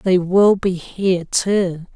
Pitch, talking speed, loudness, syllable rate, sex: 185 Hz, 155 wpm, -17 LUFS, 3.4 syllables/s, male